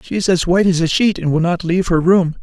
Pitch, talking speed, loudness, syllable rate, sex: 175 Hz, 320 wpm, -15 LUFS, 6.6 syllables/s, male